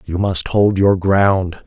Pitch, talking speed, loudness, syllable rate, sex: 95 Hz, 180 wpm, -15 LUFS, 3.2 syllables/s, male